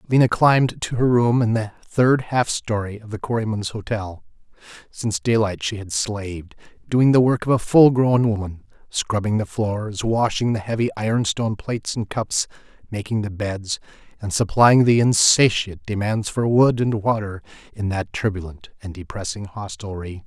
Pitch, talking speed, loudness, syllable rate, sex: 110 Hz, 165 wpm, -20 LUFS, 4.9 syllables/s, male